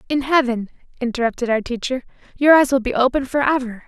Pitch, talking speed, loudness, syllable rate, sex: 255 Hz, 170 wpm, -19 LUFS, 6.2 syllables/s, female